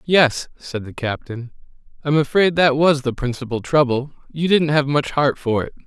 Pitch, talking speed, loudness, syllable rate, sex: 140 Hz, 175 wpm, -19 LUFS, 4.8 syllables/s, male